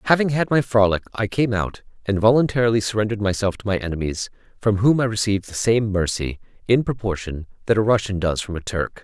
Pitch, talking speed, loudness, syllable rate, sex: 105 Hz, 200 wpm, -21 LUFS, 6.1 syllables/s, male